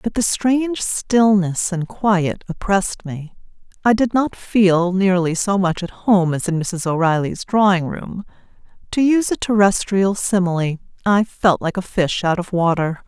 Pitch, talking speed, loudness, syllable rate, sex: 190 Hz, 160 wpm, -18 LUFS, 4.4 syllables/s, female